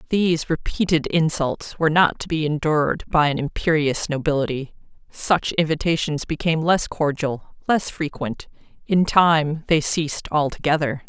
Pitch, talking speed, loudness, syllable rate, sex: 155 Hz, 120 wpm, -21 LUFS, 4.8 syllables/s, female